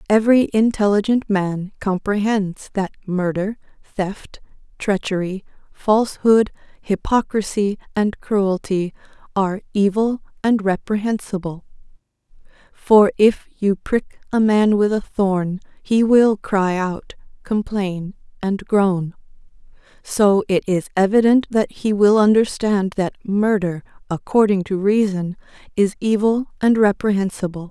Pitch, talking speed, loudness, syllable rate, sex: 200 Hz, 105 wpm, -19 LUFS, 4.0 syllables/s, female